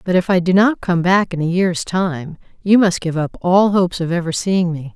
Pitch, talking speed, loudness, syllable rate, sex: 180 Hz, 255 wpm, -16 LUFS, 5.0 syllables/s, female